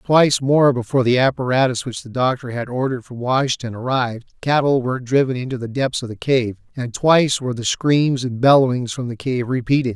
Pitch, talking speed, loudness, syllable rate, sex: 125 Hz, 200 wpm, -19 LUFS, 5.8 syllables/s, male